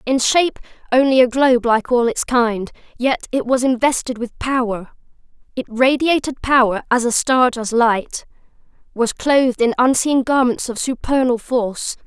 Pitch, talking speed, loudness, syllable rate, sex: 250 Hz, 155 wpm, -17 LUFS, 4.7 syllables/s, female